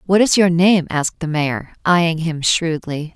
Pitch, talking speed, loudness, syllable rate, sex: 165 Hz, 190 wpm, -17 LUFS, 4.6 syllables/s, female